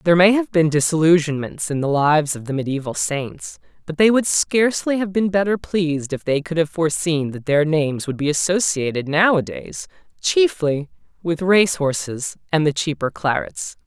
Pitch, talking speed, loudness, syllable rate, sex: 155 Hz, 170 wpm, -19 LUFS, 5.2 syllables/s, male